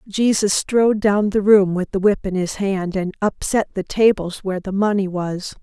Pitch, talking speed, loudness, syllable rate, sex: 195 Hz, 205 wpm, -19 LUFS, 4.8 syllables/s, female